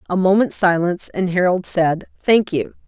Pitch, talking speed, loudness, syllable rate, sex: 185 Hz, 165 wpm, -17 LUFS, 5.0 syllables/s, female